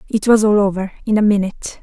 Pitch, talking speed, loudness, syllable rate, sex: 205 Hz, 230 wpm, -16 LUFS, 6.6 syllables/s, female